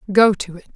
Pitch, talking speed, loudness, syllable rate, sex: 195 Hz, 240 wpm, -17 LUFS, 7.1 syllables/s, female